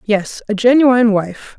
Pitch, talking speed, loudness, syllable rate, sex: 220 Hz, 150 wpm, -14 LUFS, 4.2 syllables/s, female